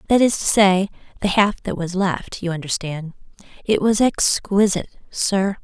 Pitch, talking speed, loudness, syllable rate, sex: 190 Hz, 150 wpm, -19 LUFS, 4.6 syllables/s, female